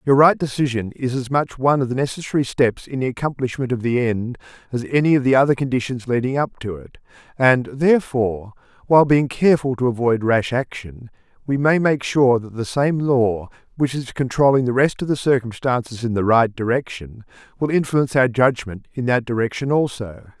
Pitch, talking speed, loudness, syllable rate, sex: 125 Hz, 190 wpm, -19 LUFS, 5.5 syllables/s, male